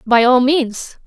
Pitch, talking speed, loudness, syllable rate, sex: 255 Hz, 170 wpm, -14 LUFS, 3.3 syllables/s, female